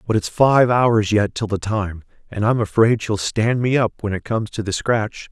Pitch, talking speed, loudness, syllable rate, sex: 110 Hz, 235 wpm, -19 LUFS, 4.8 syllables/s, male